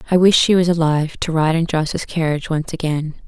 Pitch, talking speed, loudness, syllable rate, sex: 160 Hz, 220 wpm, -17 LUFS, 5.6 syllables/s, female